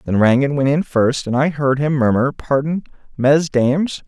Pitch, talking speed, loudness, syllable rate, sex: 140 Hz, 175 wpm, -17 LUFS, 4.8 syllables/s, male